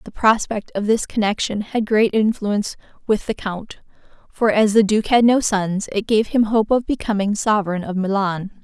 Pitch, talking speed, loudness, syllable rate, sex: 210 Hz, 190 wpm, -19 LUFS, 4.8 syllables/s, female